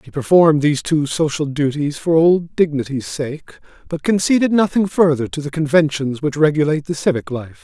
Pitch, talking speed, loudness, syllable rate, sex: 155 Hz, 175 wpm, -17 LUFS, 5.4 syllables/s, male